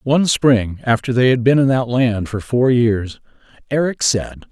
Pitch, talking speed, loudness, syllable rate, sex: 120 Hz, 185 wpm, -16 LUFS, 4.4 syllables/s, male